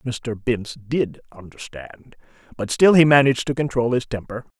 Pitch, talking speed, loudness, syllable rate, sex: 125 Hz, 155 wpm, -19 LUFS, 5.4 syllables/s, male